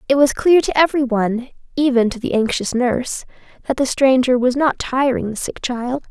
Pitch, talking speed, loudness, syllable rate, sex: 255 Hz, 195 wpm, -17 LUFS, 5.4 syllables/s, female